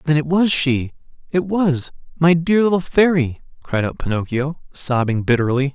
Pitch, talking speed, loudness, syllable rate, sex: 150 Hz, 135 wpm, -18 LUFS, 4.7 syllables/s, male